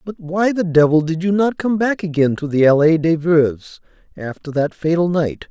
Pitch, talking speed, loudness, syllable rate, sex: 165 Hz, 205 wpm, -17 LUFS, 5.0 syllables/s, male